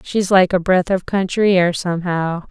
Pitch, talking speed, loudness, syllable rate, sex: 180 Hz, 190 wpm, -17 LUFS, 4.6 syllables/s, female